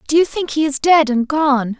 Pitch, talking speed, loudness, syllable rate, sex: 290 Hz, 265 wpm, -16 LUFS, 4.9 syllables/s, female